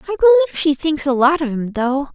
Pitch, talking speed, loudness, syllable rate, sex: 305 Hz, 250 wpm, -16 LUFS, 7.6 syllables/s, female